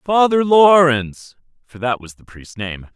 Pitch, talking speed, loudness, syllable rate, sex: 135 Hz, 140 wpm, -15 LUFS, 3.8 syllables/s, male